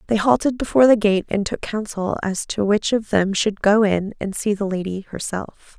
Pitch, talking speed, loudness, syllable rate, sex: 205 Hz, 220 wpm, -20 LUFS, 4.9 syllables/s, female